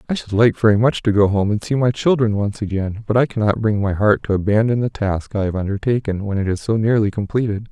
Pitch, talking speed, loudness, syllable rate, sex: 105 Hz, 255 wpm, -18 LUFS, 6.0 syllables/s, male